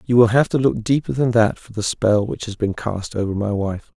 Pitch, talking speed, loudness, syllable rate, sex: 110 Hz, 270 wpm, -20 LUFS, 5.2 syllables/s, male